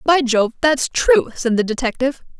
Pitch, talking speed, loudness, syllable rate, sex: 265 Hz, 175 wpm, -17 LUFS, 4.9 syllables/s, female